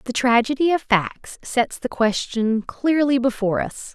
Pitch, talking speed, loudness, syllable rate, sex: 245 Hz, 150 wpm, -20 LUFS, 4.3 syllables/s, female